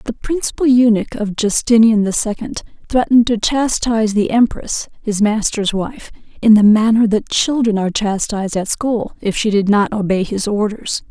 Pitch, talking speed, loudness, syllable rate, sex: 220 Hz, 170 wpm, -15 LUFS, 5.0 syllables/s, female